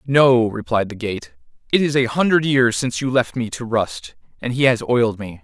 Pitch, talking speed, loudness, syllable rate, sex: 125 Hz, 220 wpm, -19 LUFS, 5.1 syllables/s, male